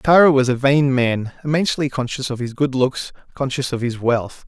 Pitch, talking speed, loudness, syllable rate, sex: 130 Hz, 200 wpm, -19 LUFS, 5.1 syllables/s, male